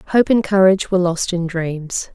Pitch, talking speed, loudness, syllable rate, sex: 180 Hz, 195 wpm, -17 LUFS, 4.8 syllables/s, female